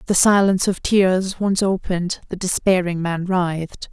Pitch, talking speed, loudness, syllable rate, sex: 185 Hz, 155 wpm, -19 LUFS, 4.7 syllables/s, female